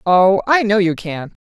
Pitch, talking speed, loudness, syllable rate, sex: 195 Hz, 210 wpm, -15 LUFS, 4.3 syllables/s, female